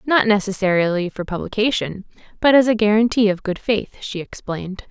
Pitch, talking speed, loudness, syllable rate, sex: 205 Hz, 160 wpm, -19 LUFS, 5.5 syllables/s, female